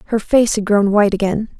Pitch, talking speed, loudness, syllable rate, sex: 210 Hz, 225 wpm, -15 LUFS, 5.4 syllables/s, female